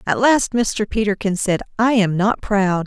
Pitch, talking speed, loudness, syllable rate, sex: 205 Hz, 190 wpm, -18 LUFS, 4.2 syllables/s, female